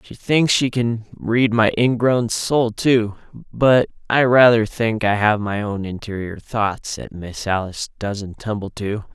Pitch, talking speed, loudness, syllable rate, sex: 110 Hz, 155 wpm, -19 LUFS, 3.8 syllables/s, male